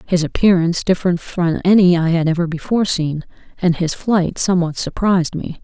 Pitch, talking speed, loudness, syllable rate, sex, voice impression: 175 Hz, 170 wpm, -17 LUFS, 5.7 syllables/s, female, feminine, adult-like, slightly dark, slightly cool, intellectual, calm